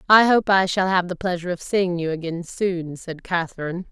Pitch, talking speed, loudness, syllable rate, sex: 180 Hz, 215 wpm, -21 LUFS, 5.4 syllables/s, female